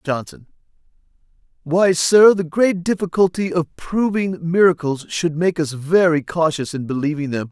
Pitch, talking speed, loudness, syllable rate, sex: 170 Hz, 135 wpm, -18 LUFS, 4.5 syllables/s, male